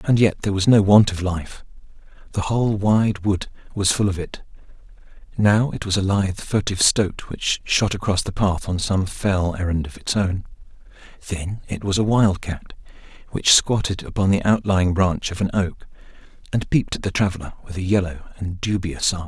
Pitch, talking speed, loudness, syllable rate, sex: 95 Hz, 185 wpm, -21 LUFS, 5.1 syllables/s, male